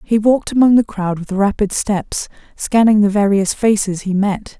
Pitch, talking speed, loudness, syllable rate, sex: 205 Hz, 185 wpm, -15 LUFS, 4.7 syllables/s, female